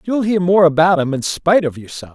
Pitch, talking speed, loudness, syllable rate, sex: 180 Hz, 250 wpm, -15 LUFS, 5.9 syllables/s, female